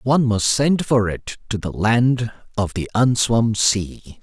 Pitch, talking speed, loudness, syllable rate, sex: 110 Hz, 170 wpm, -19 LUFS, 3.7 syllables/s, male